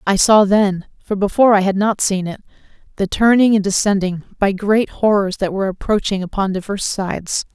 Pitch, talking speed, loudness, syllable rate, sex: 200 Hz, 185 wpm, -16 LUFS, 5.4 syllables/s, female